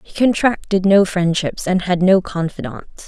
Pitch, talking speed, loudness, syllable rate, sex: 185 Hz, 155 wpm, -16 LUFS, 4.4 syllables/s, female